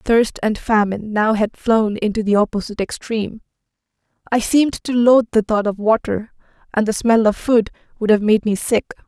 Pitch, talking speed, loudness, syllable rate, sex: 215 Hz, 185 wpm, -18 LUFS, 5.4 syllables/s, female